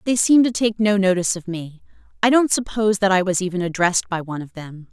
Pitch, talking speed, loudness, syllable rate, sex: 195 Hz, 245 wpm, -19 LUFS, 6.6 syllables/s, female